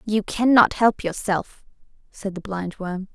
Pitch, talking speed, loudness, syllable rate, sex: 200 Hz, 135 wpm, -22 LUFS, 3.9 syllables/s, female